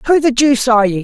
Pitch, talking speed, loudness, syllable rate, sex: 250 Hz, 290 wpm, -12 LUFS, 7.8 syllables/s, female